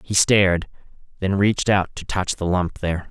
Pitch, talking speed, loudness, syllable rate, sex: 95 Hz, 195 wpm, -20 LUFS, 5.2 syllables/s, male